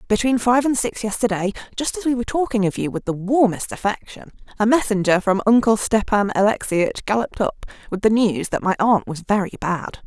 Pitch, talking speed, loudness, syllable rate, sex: 215 Hz, 195 wpm, -20 LUFS, 5.8 syllables/s, female